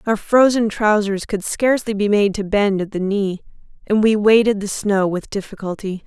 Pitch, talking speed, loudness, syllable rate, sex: 205 Hz, 190 wpm, -18 LUFS, 4.9 syllables/s, female